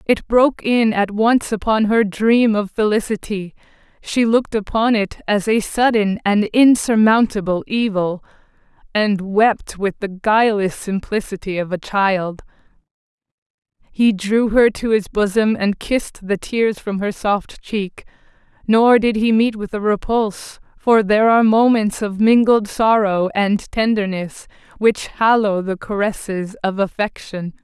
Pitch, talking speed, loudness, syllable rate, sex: 210 Hz, 140 wpm, -17 LUFS, 4.3 syllables/s, female